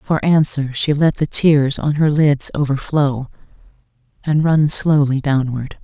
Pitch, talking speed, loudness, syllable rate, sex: 145 Hz, 145 wpm, -16 LUFS, 3.9 syllables/s, female